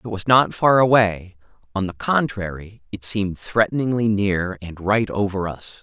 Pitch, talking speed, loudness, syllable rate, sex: 105 Hz, 165 wpm, -20 LUFS, 4.6 syllables/s, male